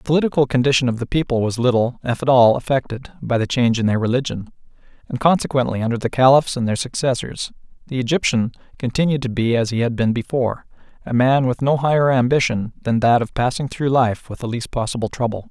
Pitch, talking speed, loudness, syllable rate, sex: 125 Hz, 200 wpm, -19 LUFS, 6.2 syllables/s, male